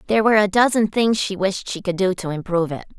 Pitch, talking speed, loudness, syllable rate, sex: 195 Hz, 260 wpm, -19 LUFS, 6.7 syllables/s, female